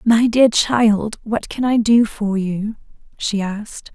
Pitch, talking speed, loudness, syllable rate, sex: 220 Hz, 165 wpm, -17 LUFS, 3.5 syllables/s, female